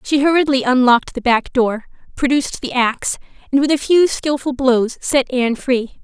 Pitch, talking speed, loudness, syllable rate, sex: 260 Hz, 180 wpm, -16 LUFS, 5.3 syllables/s, female